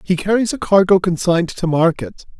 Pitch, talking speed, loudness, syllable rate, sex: 180 Hz, 175 wpm, -16 LUFS, 5.5 syllables/s, male